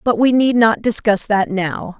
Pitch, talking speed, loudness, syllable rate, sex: 220 Hz, 210 wpm, -15 LUFS, 4.2 syllables/s, female